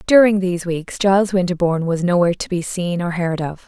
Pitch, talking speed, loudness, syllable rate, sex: 180 Hz, 210 wpm, -18 LUFS, 6.0 syllables/s, female